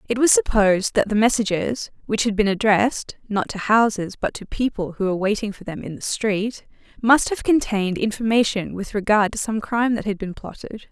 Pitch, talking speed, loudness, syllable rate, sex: 215 Hz, 205 wpm, -21 LUFS, 5.5 syllables/s, female